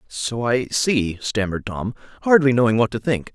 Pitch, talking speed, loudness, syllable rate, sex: 120 Hz, 180 wpm, -20 LUFS, 4.9 syllables/s, male